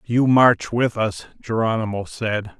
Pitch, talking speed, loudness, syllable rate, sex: 115 Hz, 140 wpm, -20 LUFS, 3.8 syllables/s, male